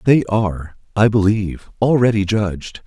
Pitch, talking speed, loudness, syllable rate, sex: 105 Hz, 125 wpm, -17 LUFS, 5.0 syllables/s, male